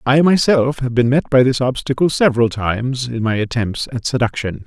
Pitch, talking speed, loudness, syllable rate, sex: 125 Hz, 195 wpm, -17 LUFS, 5.4 syllables/s, male